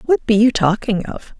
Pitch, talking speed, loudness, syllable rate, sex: 220 Hz, 215 wpm, -16 LUFS, 4.8 syllables/s, female